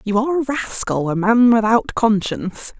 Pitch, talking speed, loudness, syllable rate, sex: 225 Hz, 170 wpm, -17 LUFS, 4.9 syllables/s, female